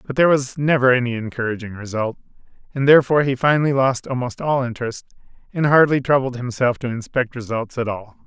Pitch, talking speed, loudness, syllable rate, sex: 125 Hz, 175 wpm, -19 LUFS, 6.3 syllables/s, male